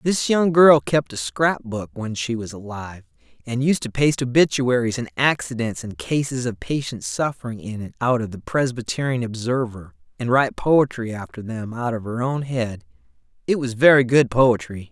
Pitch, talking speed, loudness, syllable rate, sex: 120 Hz, 180 wpm, -21 LUFS, 5.0 syllables/s, male